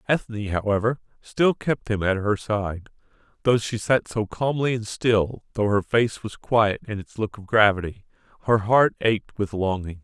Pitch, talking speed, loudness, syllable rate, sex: 110 Hz, 180 wpm, -23 LUFS, 4.4 syllables/s, male